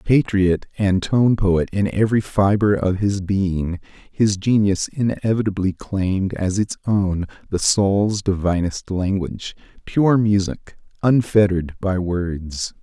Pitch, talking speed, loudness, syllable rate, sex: 100 Hz, 120 wpm, -20 LUFS, 3.9 syllables/s, male